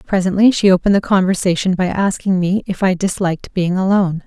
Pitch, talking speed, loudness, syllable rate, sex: 190 Hz, 185 wpm, -16 LUFS, 6.1 syllables/s, female